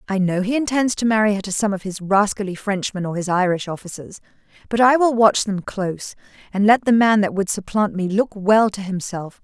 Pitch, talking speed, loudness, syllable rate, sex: 200 Hz, 225 wpm, -19 LUFS, 5.5 syllables/s, female